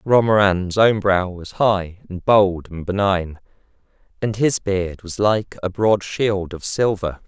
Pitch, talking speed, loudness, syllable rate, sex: 95 Hz, 155 wpm, -19 LUFS, 3.7 syllables/s, male